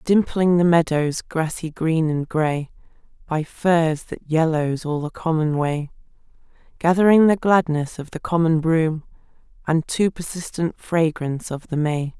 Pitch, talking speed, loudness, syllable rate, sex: 160 Hz, 145 wpm, -21 LUFS, 4.3 syllables/s, female